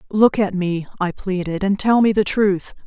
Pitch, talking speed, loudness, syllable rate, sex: 195 Hz, 210 wpm, -19 LUFS, 4.5 syllables/s, female